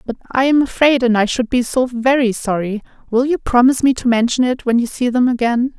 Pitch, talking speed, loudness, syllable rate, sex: 245 Hz, 240 wpm, -16 LUFS, 5.8 syllables/s, female